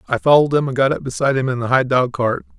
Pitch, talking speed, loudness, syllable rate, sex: 130 Hz, 300 wpm, -17 LUFS, 7.4 syllables/s, male